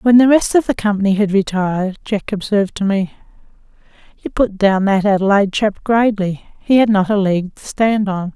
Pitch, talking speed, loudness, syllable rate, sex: 205 Hz, 195 wpm, -16 LUFS, 5.4 syllables/s, female